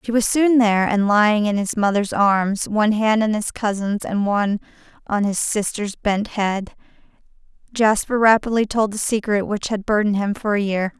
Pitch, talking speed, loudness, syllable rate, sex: 210 Hz, 185 wpm, -19 LUFS, 5.0 syllables/s, female